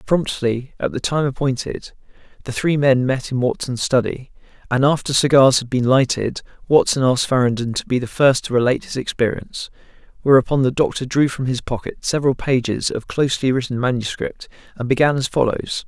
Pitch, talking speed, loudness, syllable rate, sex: 130 Hz, 175 wpm, -19 LUFS, 5.6 syllables/s, male